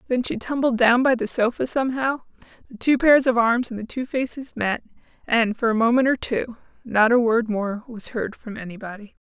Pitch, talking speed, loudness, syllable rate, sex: 235 Hz, 210 wpm, -21 LUFS, 5.2 syllables/s, female